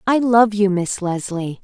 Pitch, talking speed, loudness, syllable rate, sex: 200 Hz, 185 wpm, -18 LUFS, 4.0 syllables/s, female